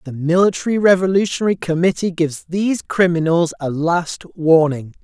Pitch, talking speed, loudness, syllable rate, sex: 175 Hz, 120 wpm, -17 LUFS, 5.4 syllables/s, male